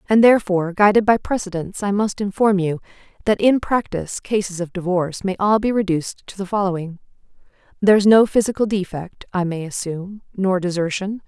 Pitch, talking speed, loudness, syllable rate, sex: 195 Hz, 160 wpm, -19 LUFS, 5.8 syllables/s, female